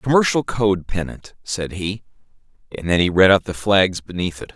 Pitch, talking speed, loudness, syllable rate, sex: 100 Hz, 185 wpm, -19 LUFS, 4.8 syllables/s, male